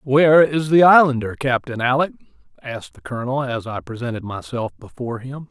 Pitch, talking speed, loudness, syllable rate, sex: 130 Hz, 165 wpm, -18 LUFS, 5.8 syllables/s, male